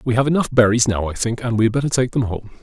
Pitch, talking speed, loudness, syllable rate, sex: 120 Hz, 320 wpm, -18 LUFS, 7.0 syllables/s, male